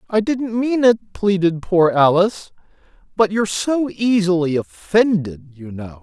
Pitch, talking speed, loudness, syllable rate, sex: 190 Hz, 140 wpm, -17 LUFS, 4.2 syllables/s, male